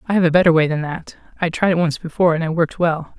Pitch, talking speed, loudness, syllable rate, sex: 165 Hz, 300 wpm, -18 LUFS, 7.1 syllables/s, female